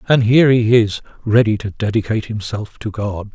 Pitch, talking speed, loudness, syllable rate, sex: 110 Hz, 180 wpm, -17 LUFS, 5.3 syllables/s, male